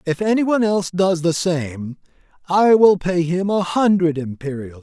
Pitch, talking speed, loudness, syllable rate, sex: 175 Hz, 160 wpm, -18 LUFS, 4.6 syllables/s, male